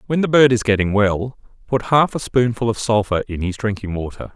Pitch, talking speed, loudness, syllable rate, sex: 110 Hz, 220 wpm, -18 LUFS, 5.4 syllables/s, male